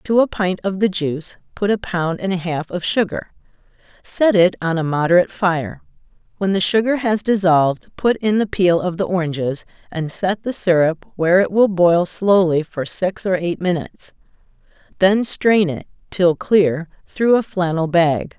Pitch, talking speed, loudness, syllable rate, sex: 185 Hz, 170 wpm, -18 LUFS, 4.7 syllables/s, female